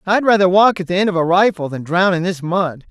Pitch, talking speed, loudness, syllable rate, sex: 180 Hz, 290 wpm, -15 LUFS, 5.8 syllables/s, male